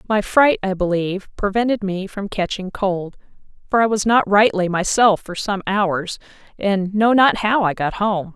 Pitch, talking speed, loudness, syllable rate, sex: 200 Hz, 180 wpm, -18 LUFS, 4.5 syllables/s, female